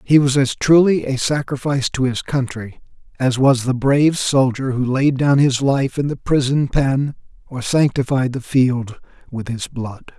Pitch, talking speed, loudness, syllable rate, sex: 135 Hz, 175 wpm, -18 LUFS, 4.5 syllables/s, male